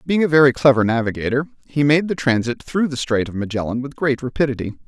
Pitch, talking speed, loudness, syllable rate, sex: 130 Hz, 210 wpm, -19 LUFS, 6.3 syllables/s, male